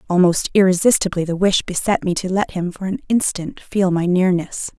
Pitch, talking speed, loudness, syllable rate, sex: 185 Hz, 190 wpm, -18 LUFS, 5.2 syllables/s, female